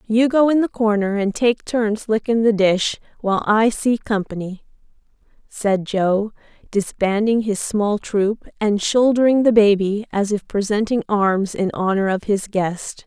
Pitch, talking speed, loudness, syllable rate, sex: 210 Hz, 155 wpm, -19 LUFS, 4.2 syllables/s, female